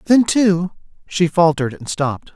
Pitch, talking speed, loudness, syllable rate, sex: 170 Hz, 155 wpm, -17 LUFS, 4.9 syllables/s, male